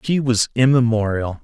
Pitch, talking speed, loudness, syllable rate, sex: 120 Hz, 125 wpm, -17 LUFS, 4.7 syllables/s, male